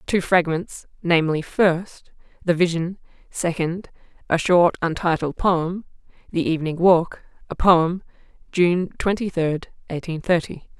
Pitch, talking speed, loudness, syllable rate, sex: 170 Hz, 115 wpm, -21 LUFS, 4.1 syllables/s, female